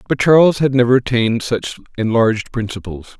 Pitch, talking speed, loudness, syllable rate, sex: 120 Hz, 150 wpm, -15 LUFS, 5.7 syllables/s, male